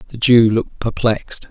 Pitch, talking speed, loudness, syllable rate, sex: 115 Hz, 160 wpm, -16 LUFS, 5.6 syllables/s, male